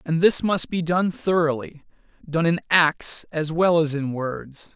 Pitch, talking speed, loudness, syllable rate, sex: 160 Hz, 165 wpm, -21 LUFS, 3.9 syllables/s, male